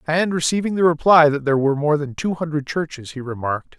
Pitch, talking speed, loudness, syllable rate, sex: 155 Hz, 220 wpm, -19 LUFS, 6.3 syllables/s, male